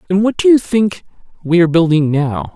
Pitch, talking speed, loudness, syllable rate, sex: 180 Hz, 210 wpm, -13 LUFS, 5.7 syllables/s, male